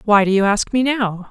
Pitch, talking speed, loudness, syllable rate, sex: 215 Hz, 275 wpm, -17 LUFS, 5.0 syllables/s, female